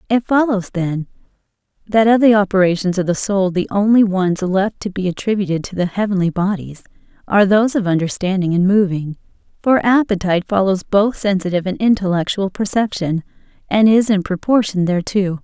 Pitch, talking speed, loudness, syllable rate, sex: 195 Hz, 155 wpm, -16 LUFS, 5.6 syllables/s, female